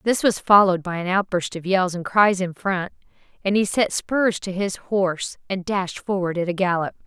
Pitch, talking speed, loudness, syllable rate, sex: 190 Hz, 210 wpm, -21 LUFS, 5.0 syllables/s, female